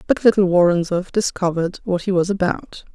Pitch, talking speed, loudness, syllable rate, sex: 185 Hz, 165 wpm, -19 LUFS, 5.8 syllables/s, female